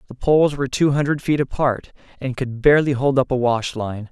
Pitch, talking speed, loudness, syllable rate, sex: 130 Hz, 220 wpm, -19 LUFS, 5.8 syllables/s, male